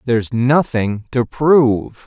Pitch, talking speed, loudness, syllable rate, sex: 125 Hz, 115 wpm, -16 LUFS, 3.7 syllables/s, male